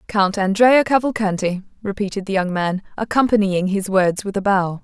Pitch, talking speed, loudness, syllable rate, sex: 200 Hz, 160 wpm, -19 LUFS, 5.1 syllables/s, female